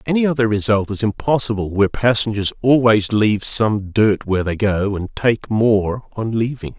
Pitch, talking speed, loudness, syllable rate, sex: 110 Hz, 170 wpm, -17 LUFS, 4.9 syllables/s, male